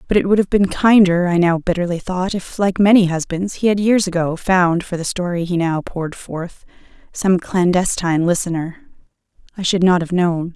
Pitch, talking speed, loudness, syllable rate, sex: 180 Hz, 195 wpm, -17 LUFS, 5.1 syllables/s, female